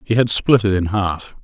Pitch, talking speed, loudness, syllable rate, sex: 105 Hz, 250 wpm, -17 LUFS, 4.7 syllables/s, male